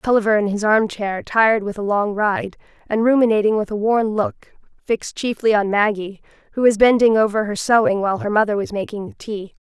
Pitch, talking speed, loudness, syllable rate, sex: 210 Hz, 205 wpm, -18 LUFS, 5.6 syllables/s, female